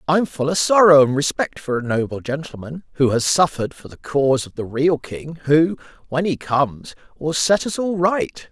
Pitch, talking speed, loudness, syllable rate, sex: 150 Hz, 205 wpm, -19 LUFS, 4.9 syllables/s, male